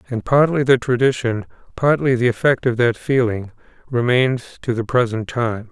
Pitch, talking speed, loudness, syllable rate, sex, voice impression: 120 Hz, 160 wpm, -18 LUFS, 4.8 syllables/s, male, masculine, very adult-like, slightly dark, cool, slightly sincere, slightly calm